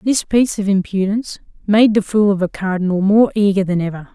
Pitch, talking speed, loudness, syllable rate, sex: 200 Hz, 205 wpm, -16 LUFS, 5.8 syllables/s, female